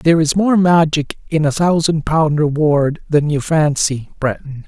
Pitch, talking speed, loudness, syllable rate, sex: 155 Hz, 165 wpm, -15 LUFS, 4.3 syllables/s, male